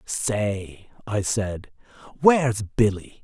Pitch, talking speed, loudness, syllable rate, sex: 110 Hz, 95 wpm, -23 LUFS, 3.0 syllables/s, male